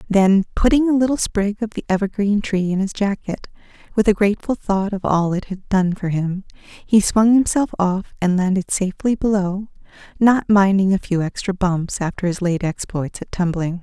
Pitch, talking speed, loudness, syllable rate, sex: 195 Hz, 185 wpm, -19 LUFS, 4.9 syllables/s, female